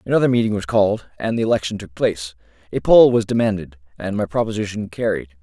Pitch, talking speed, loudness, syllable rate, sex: 100 Hz, 190 wpm, -19 LUFS, 6.6 syllables/s, male